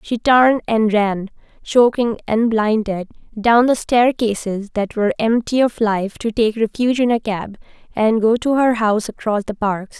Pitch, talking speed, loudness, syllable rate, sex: 220 Hz, 175 wpm, -17 LUFS, 4.6 syllables/s, female